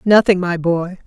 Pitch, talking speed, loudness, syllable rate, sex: 180 Hz, 170 wpm, -16 LUFS, 4.4 syllables/s, female